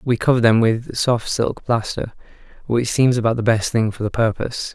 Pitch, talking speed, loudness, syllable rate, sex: 115 Hz, 215 wpm, -19 LUFS, 5.3 syllables/s, male